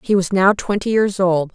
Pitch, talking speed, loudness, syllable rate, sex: 190 Hz, 235 wpm, -17 LUFS, 4.8 syllables/s, female